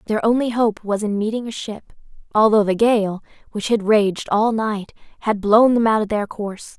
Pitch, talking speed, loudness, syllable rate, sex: 215 Hz, 205 wpm, -19 LUFS, 4.9 syllables/s, female